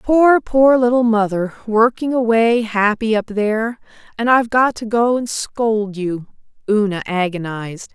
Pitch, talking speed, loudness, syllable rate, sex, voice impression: 220 Hz, 145 wpm, -17 LUFS, 4.3 syllables/s, female, very feminine, slightly young, adult-like, thin, tensed, powerful, bright, very hard, very clear, fluent, slightly raspy, cool, intellectual, very refreshing, sincere, calm, friendly, slightly reassuring, unique, slightly elegant, wild, slightly sweet, lively, strict, slightly intense, sharp